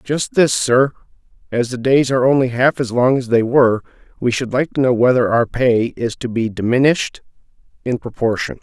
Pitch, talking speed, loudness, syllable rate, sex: 125 Hz, 195 wpm, -16 LUFS, 5.4 syllables/s, male